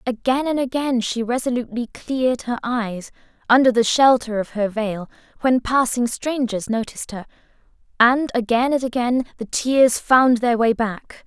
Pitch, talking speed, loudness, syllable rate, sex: 240 Hz, 155 wpm, -20 LUFS, 4.6 syllables/s, female